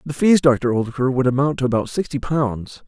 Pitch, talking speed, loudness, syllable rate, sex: 135 Hz, 210 wpm, -19 LUFS, 5.4 syllables/s, male